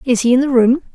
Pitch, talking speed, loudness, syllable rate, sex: 255 Hz, 315 wpm, -14 LUFS, 6.7 syllables/s, female